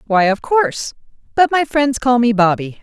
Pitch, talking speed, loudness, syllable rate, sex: 245 Hz, 190 wpm, -15 LUFS, 4.9 syllables/s, female